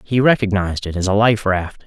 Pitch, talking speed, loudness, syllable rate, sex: 100 Hz, 225 wpm, -17 LUFS, 5.7 syllables/s, male